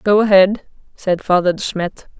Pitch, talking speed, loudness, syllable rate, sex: 195 Hz, 165 wpm, -16 LUFS, 4.6 syllables/s, female